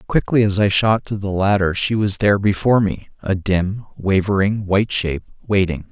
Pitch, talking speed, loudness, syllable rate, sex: 100 Hz, 185 wpm, -18 LUFS, 5.2 syllables/s, male